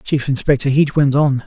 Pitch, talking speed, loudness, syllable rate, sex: 140 Hz, 205 wpm, -16 LUFS, 4.9 syllables/s, male